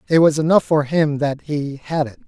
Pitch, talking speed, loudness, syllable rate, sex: 150 Hz, 240 wpm, -18 LUFS, 4.9 syllables/s, male